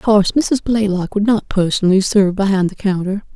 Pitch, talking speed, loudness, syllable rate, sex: 200 Hz, 195 wpm, -16 LUFS, 6.0 syllables/s, female